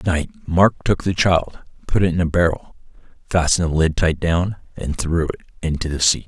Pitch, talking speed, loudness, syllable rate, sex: 85 Hz, 210 wpm, -19 LUFS, 5.3 syllables/s, male